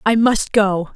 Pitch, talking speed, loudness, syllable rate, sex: 210 Hz, 190 wpm, -16 LUFS, 3.6 syllables/s, female